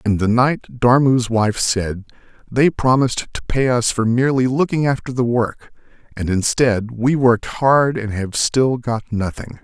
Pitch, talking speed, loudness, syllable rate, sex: 120 Hz, 170 wpm, -18 LUFS, 4.4 syllables/s, male